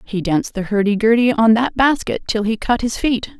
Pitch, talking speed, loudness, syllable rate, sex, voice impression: 225 Hz, 230 wpm, -17 LUFS, 5.3 syllables/s, female, very feminine, adult-like, slightly middle-aged, thin, slightly tensed, slightly weak, slightly bright, soft, clear, fluent, slightly cute, intellectual, very refreshing, sincere, calm, very friendly, reassuring, unique, elegant, slightly wild, sweet, slightly lively, kind, slightly sharp, slightly modest